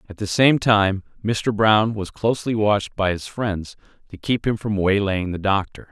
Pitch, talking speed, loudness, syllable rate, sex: 105 Hz, 195 wpm, -20 LUFS, 4.6 syllables/s, male